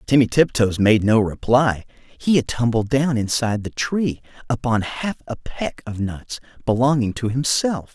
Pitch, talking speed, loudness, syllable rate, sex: 120 Hz, 160 wpm, -20 LUFS, 4.4 syllables/s, male